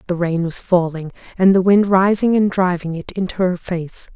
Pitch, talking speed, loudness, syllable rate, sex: 180 Hz, 200 wpm, -17 LUFS, 4.9 syllables/s, female